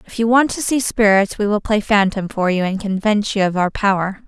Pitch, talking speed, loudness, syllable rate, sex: 205 Hz, 255 wpm, -17 LUFS, 5.6 syllables/s, female